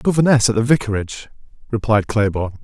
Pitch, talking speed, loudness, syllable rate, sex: 115 Hz, 135 wpm, -17 LUFS, 6.6 syllables/s, male